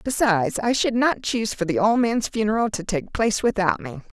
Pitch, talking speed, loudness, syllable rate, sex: 225 Hz, 215 wpm, -22 LUFS, 5.6 syllables/s, female